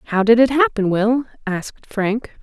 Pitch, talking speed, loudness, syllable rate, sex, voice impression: 225 Hz, 175 wpm, -18 LUFS, 4.6 syllables/s, female, very feminine, very adult-like, middle-aged, thin, slightly relaxed, slightly weak, bright, hard, very clear, fluent, very cool, very intellectual, refreshing, sincere, very calm, slightly friendly, very elegant, lively, slightly kind, slightly modest